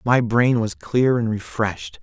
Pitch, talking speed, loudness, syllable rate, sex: 110 Hz, 180 wpm, -20 LUFS, 4.2 syllables/s, male